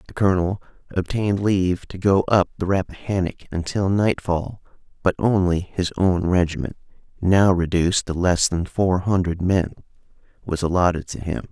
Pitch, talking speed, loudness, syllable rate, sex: 90 Hz, 145 wpm, -21 LUFS, 5.1 syllables/s, male